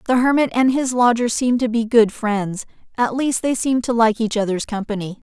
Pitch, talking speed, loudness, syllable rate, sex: 235 Hz, 215 wpm, -18 LUFS, 5.1 syllables/s, female